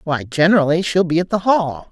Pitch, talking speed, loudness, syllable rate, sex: 170 Hz, 220 wpm, -16 LUFS, 5.6 syllables/s, female